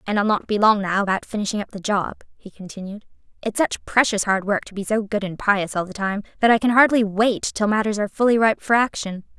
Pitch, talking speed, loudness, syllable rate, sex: 210 Hz, 250 wpm, -20 LUFS, 5.9 syllables/s, female